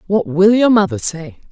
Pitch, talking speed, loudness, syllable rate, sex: 190 Hz, 200 wpm, -14 LUFS, 4.7 syllables/s, female